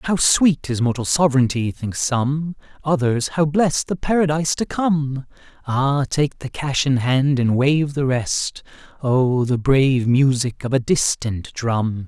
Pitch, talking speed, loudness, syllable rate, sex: 135 Hz, 150 wpm, -19 LUFS, 3.9 syllables/s, male